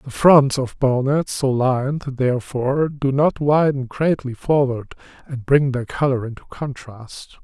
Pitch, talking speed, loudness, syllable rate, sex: 135 Hz, 145 wpm, -19 LUFS, 4.2 syllables/s, male